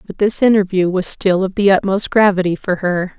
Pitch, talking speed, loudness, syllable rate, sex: 190 Hz, 205 wpm, -15 LUFS, 5.2 syllables/s, female